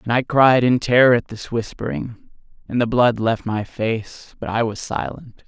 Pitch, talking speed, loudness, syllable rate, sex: 115 Hz, 195 wpm, -19 LUFS, 4.4 syllables/s, male